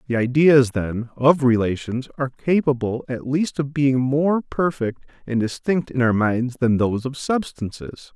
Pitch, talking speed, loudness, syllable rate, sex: 130 Hz, 160 wpm, -21 LUFS, 4.4 syllables/s, male